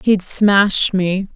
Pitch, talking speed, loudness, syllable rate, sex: 195 Hz, 135 wpm, -14 LUFS, 2.5 syllables/s, female